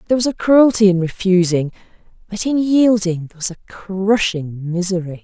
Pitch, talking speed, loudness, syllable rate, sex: 195 Hz, 160 wpm, -16 LUFS, 5.3 syllables/s, female